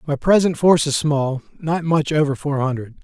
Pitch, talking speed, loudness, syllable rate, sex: 150 Hz, 180 wpm, -19 LUFS, 5.3 syllables/s, male